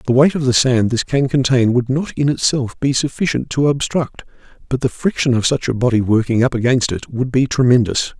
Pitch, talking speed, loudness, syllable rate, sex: 130 Hz, 220 wpm, -16 LUFS, 5.4 syllables/s, male